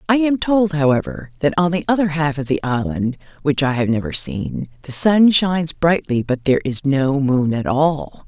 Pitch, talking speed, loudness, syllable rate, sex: 150 Hz, 190 wpm, -18 LUFS, 4.9 syllables/s, female